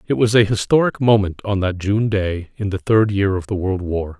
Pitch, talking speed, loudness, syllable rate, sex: 100 Hz, 245 wpm, -18 LUFS, 5.0 syllables/s, male